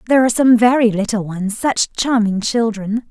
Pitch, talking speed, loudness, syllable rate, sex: 225 Hz, 155 wpm, -16 LUFS, 5.2 syllables/s, female